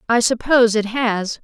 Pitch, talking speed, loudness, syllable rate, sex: 230 Hz, 165 wpm, -17 LUFS, 4.8 syllables/s, female